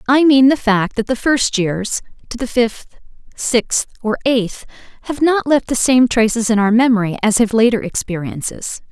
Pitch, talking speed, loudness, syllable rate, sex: 235 Hz, 180 wpm, -16 LUFS, 4.6 syllables/s, female